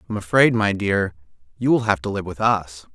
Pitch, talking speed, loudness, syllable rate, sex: 100 Hz, 225 wpm, -20 LUFS, 5.3 syllables/s, male